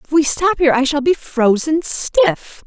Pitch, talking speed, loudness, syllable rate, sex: 280 Hz, 200 wpm, -15 LUFS, 4.4 syllables/s, female